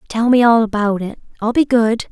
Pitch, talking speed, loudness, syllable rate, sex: 230 Hz, 225 wpm, -15 LUFS, 5.1 syllables/s, female